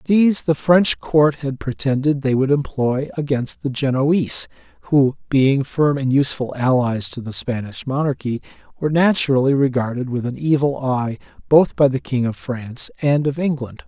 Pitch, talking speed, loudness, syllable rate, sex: 135 Hz, 165 wpm, -19 LUFS, 4.9 syllables/s, male